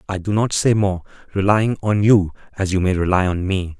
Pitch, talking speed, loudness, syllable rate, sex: 95 Hz, 220 wpm, -18 LUFS, 5.0 syllables/s, male